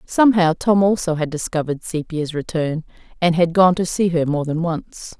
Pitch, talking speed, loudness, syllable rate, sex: 170 Hz, 185 wpm, -19 LUFS, 5.1 syllables/s, female